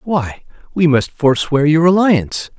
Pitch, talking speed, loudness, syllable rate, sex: 150 Hz, 140 wpm, -14 LUFS, 4.2 syllables/s, male